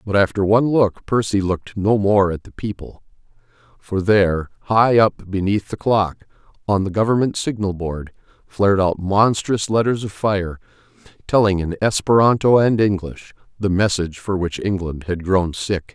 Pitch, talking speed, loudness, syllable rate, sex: 100 Hz, 160 wpm, -19 LUFS, 4.8 syllables/s, male